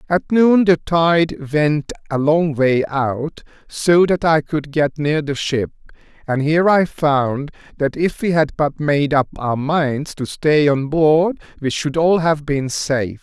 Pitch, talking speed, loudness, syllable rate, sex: 150 Hz, 180 wpm, -17 LUFS, 3.7 syllables/s, male